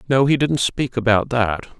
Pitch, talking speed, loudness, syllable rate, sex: 125 Hz, 200 wpm, -19 LUFS, 4.5 syllables/s, male